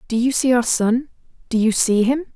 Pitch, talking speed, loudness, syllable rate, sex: 240 Hz, 230 wpm, -18 LUFS, 5.2 syllables/s, female